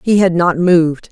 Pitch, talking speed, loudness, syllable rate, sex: 175 Hz, 215 wpm, -12 LUFS, 5.0 syllables/s, female